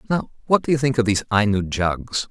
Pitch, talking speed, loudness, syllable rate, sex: 115 Hz, 235 wpm, -20 LUFS, 5.9 syllables/s, male